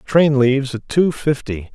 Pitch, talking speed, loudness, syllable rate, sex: 135 Hz, 170 wpm, -17 LUFS, 4.1 syllables/s, male